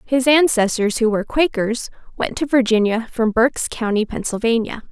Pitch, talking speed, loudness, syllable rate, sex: 235 Hz, 145 wpm, -18 LUFS, 4.9 syllables/s, female